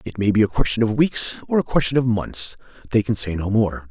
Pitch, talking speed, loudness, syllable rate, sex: 115 Hz, 260 wpm, -21 LUFS, 5.6 syllables/s, male